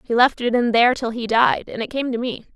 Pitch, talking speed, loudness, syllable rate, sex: 235 Hz, 305 wpm, -19 LUFS, 5.8 syllables/s, female